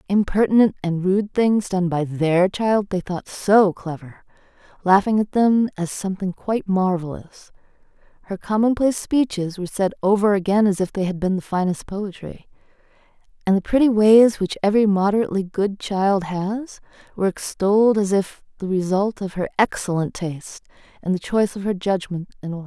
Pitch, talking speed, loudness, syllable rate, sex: 195 Hz, 165 wpm, -20 LUFS, 5.2 syllables/s, female